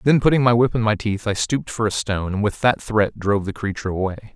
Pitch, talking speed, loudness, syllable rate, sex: 105 Hz, 275 wpm, -20 LUFS, 6.4 syllables/s, male